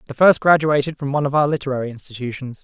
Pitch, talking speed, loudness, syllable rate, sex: 140 Hz, 205 wpm, -18 LUFS, 7.4 syllables/s, male